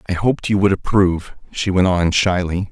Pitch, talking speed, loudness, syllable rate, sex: 95 Hz, 200 wpm, -17 LUFS, 5.5 syllables/s, male